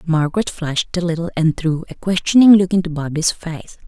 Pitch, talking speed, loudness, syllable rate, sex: 170 Hz, 185 wpm, -17 LUFS, 5.6 syllables/s, female